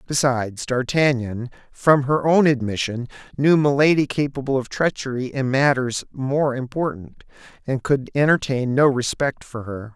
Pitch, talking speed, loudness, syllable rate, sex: 135 Hz, 135 wpm, -20 LUFS, 4.6 syllables/s, male